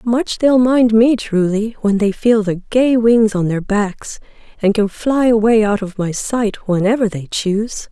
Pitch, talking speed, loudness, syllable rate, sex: 215 Hz, 190 wpm, -15 LUFS, 4.1 syllables/s, female